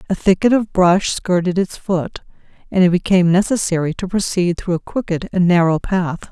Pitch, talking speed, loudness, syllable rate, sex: 180 Hz, 180 wpm, -17 LUFS, 5.2 syllables/s, female